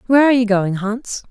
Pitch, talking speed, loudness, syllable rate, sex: 225 Hz, 230 wpm, -16 LUFS, 6.4 syllables/s, female